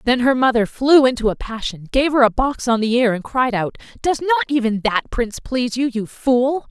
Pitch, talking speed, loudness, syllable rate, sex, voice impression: 250 Hz, 235 wpm, -18 LUFS, 5.3 syllables/s, female, feminine, adult-like, slightly tensed, powerful, slightly soft, clear, fluent, intellectual, slightly calm, reassuring, elegant, lively, sharp